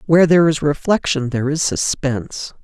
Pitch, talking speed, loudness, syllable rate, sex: 145 Hz, 160 wpm, -17 LUFS, 5.8 syllables/s, male